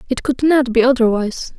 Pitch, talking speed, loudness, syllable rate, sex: 250 Hz, 190 wpm, -16 LUFS, 5.9 syllables/s, female